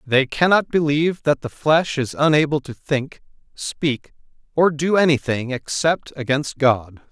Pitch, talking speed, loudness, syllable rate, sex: 145 Hz, 145 wpm, -20 LUFS, 4.2 syllables/s, male